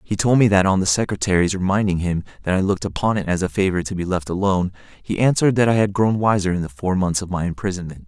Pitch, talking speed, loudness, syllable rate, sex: 95 Hz, 260 wpm, -20 LUFS, 6.8 syllables/s, male